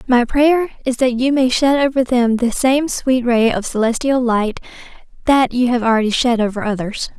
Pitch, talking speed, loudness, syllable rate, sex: 245 Hz, 190 wpm, -16 LUFS, 4.9 syllables/s, female